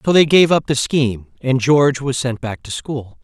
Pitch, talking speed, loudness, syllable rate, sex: 135 Hz, 240 wpm, -17 LUFS, 5.0 syllables/s, male